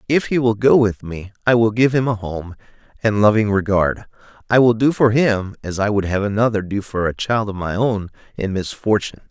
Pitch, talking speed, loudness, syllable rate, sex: 105 Hz, 215 wpm, -18 LUFS, 5.3 syllables/s, male